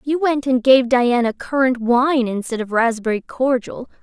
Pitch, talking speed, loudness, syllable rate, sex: 250 Hz, 165 wpm, -18 LUFS, 4.5 syllables/s, female